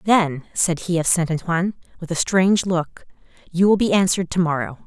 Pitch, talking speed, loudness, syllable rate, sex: 175 Hz, 195 wpm, -20 LUFS, 5.7 syllables/s, female